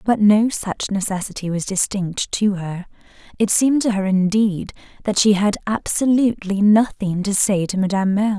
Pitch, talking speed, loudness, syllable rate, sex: 200 Hz, 165 wpm, -19 LUFS, 5.0 syllables/s, female